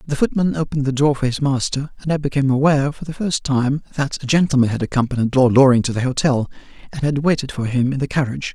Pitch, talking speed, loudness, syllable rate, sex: 135 Hz, 240 wpm, -18 LUFS, 6.7 syllables/s, male